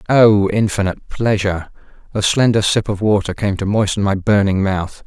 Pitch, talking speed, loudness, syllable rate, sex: 100 Hz, 165 wpm, -16 LUFS, 5.2 syllables/s, male